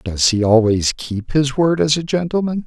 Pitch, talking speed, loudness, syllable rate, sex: 135 Hz, 205 wpm, -17 LUFS, 4.7 syllables/s, male